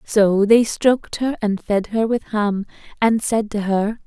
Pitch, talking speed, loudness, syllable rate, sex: 215 Hz, 190 wpm, -19 LUFS, 3.9 syllables/s, female